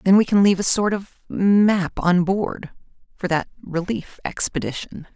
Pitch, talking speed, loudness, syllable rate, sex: 185 Hz, 150 wpm, -20 LUFS, 4.5 syllables/s, female